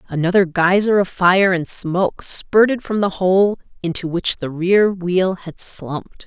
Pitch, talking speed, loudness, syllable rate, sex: 185 Hz, 165 wpm, -17 LUFS, 4.1 syllables/s, female